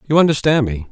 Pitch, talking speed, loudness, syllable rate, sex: 135 Hz, 195 wpm, -16 LUFS, 6.9 syllables/s, male